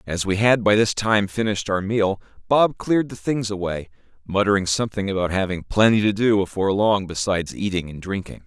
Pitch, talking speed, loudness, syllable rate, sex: 100 Hz, 190 wpm, -21 LUFS, 5.7 syllables/s, male